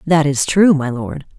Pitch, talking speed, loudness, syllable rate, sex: 150 Hz, 215 wpm, -15 LUFS, 4.2 syllables/s, female